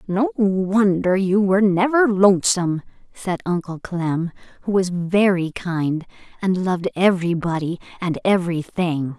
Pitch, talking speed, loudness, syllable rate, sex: 185 Hz, 120 wpm, -20 LUFS, 4.5 syllables/s, female